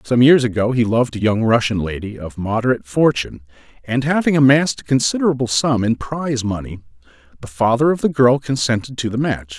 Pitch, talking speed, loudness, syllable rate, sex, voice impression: 120 Hz, 190 wpm, -17 LUFS, 6.0 syllables/s, male, masculine, middle-aged, thick, tensed, powerful, bright, clear, calm, mature, friendly, reassuring, wild, lively, kind, slightly strict